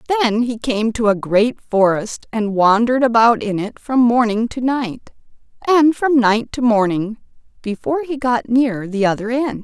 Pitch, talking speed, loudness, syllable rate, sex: 235 Hz, 175 wpm, -17 LUFS, 4.5 syllables/s, female